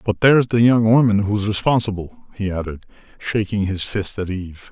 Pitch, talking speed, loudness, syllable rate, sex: 105 Hz, 180 wpm, -18 LUFS, 5.3 syllables/s, male